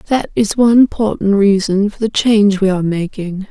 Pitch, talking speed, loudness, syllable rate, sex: 205 Hz, 190 wpm, -14 LUFS, 5.3 syllables/s, female